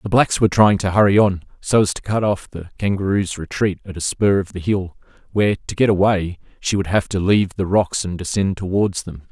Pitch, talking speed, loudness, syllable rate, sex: 95 Hz, 230 wpm, -19 LUFS, 5.7 syllables/s, male